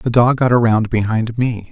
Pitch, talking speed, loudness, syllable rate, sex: 115 Hz, 210 wpm, -16 LUFS, 4.8 syllables/s, male